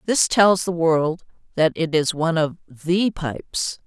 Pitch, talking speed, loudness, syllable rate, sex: 165 Hz, 170 wpm, -20 LUFS, 4.0 syllables/s, female